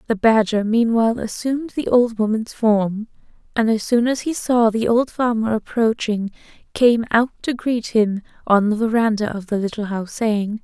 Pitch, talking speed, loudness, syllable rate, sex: 225 Hz, 175 wpm, -19 LUFS, 4.8 syllables/s, female